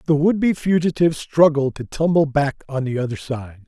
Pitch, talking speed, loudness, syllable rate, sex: 145 Hz, 195 wpm, -19 LUFS, 5.3 syllables/s, male